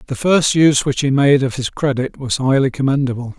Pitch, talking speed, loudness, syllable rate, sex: 135 Hz, 215 wpm, -16 LUFS, 5.6 syllables/s, male